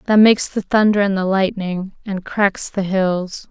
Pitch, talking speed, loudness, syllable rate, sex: 195 Hz, 190 wpm, -18 LUFS, 4.3 syllables/s, female